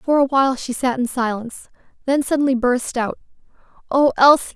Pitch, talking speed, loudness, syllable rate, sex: 260 Hz, 170 wpm, -18 LUFS, 5.6 syllables/s, female